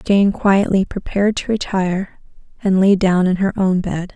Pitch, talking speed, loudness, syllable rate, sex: 190 Hz, 175 wpm, -17 LUFS, 4.6 syllables/s, female